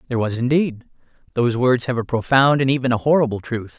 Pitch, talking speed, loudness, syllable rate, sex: 125 Hz, 205 wpm, -19 LUFS, 6.5 syllables/s, male